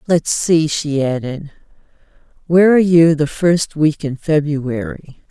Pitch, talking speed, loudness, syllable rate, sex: 155 Hz, 135 wpm, -15 LUFS, 4.1 syllables/s, female